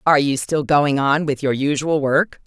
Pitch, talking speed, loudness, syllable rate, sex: 145 Hz, 220 wpm, -18 LUFS, 4.7 syllables/s, female